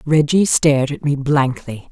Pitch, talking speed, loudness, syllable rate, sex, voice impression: 140 Hz, 155 wpm, -16 LUFS, 4.5 syllables/s, female, feminine, adult-like, slightly clear, fluent, slightly intellectual, slightly strict, slightly sharp